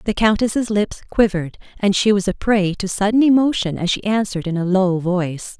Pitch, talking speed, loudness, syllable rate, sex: 200 Hz, 205 wpm, -18 LUFS, 5.5 syllables/s, female